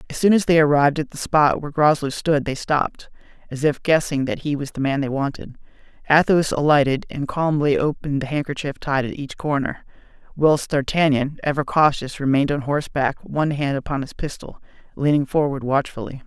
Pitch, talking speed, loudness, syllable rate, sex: 145 Hz, 180 wpm, -20 LUFS, 5.7 syllables/s, male